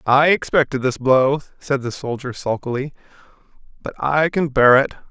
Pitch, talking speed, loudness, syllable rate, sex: 135 Hz, 155 wpm, -18 LUFS, 4.9 syllables/s, male